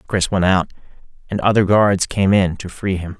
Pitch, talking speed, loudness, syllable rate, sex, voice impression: 95 Hz, 205 wpm, -17 LUFS, 4.9 syllables/s, male, masculine, adult-like, tensed, powerful, bright, clear, fluent, intellectual, friendly, unique, lively